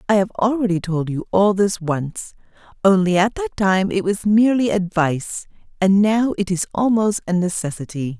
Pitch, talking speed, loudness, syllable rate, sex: 190 Hz, 170 wpm, -19 LUFS, 5.0 syllables/s, female